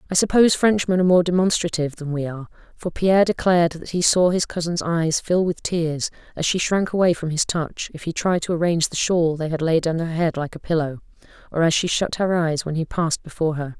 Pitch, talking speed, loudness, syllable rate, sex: 170 Hz, 240 wpm, -21 LUFS, 6.1 syllables/s, female